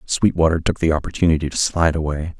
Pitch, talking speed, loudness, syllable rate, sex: 80 Hz, 175 wpm, -19 LUFS, 6.6 syllables/s, male